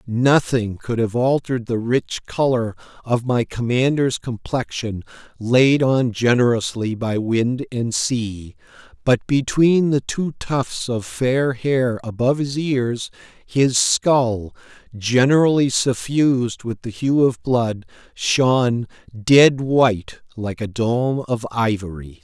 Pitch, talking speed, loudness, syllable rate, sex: 125 Hz, 125 wpm, -19 LUFS, 3.6 syllables/s, male